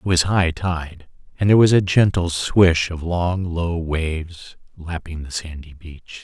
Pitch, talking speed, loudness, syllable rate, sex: 85 Hz, 175 wpm, -19 LUFS, 4.1 syllables/s, male